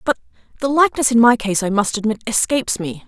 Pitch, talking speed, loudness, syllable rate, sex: 230 Hz, 215 wpm, -17 LUFS, 6.3 syllables/s, female